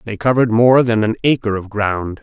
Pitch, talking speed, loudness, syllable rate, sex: 110 Hz, 215 wpm, -15 LUFS, 5.4 syllables/s, male